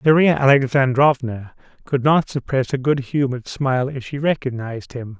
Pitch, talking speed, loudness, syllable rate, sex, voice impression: 135 Hz, 150 wpm, -19 LUFS, 5.2 syllables/s, male, masculine, middle-aged, relaxed, slightly weak, soft, slightly muffled, raspy, intellectual, calm, friendly, reassuring, slightly wild, kind, slightly modest